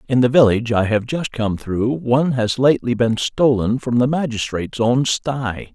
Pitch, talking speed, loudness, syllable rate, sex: 120 Hz, 190 wpm, -18 LUFS, 4.9 syllables/s, male